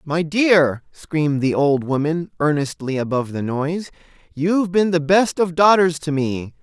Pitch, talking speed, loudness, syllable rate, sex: 160 Hz, 165 wpm, -19 LUFS, 4.6 syllables/s, male